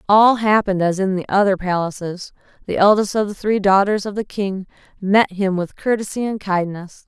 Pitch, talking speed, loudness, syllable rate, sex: 195 Hz, 185 wpm, -18 LUFS, 5.2 syllables/s, female